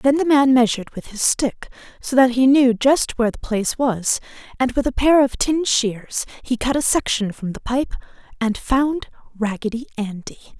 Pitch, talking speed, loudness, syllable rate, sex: 245 Hz, 195 wpm, -19 LUFS, 4.8 syllables/s, female